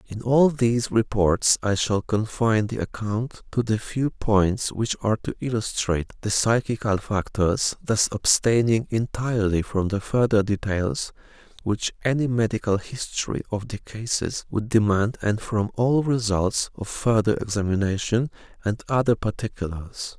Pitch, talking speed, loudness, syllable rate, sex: 110 Hz, 135 wpm, -24 LUFS, 4.5 syllables/s, male